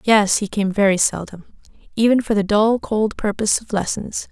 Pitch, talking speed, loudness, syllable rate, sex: 210 Hz, 180 wpm, -18 LUFS, 5.1 syllables/s, female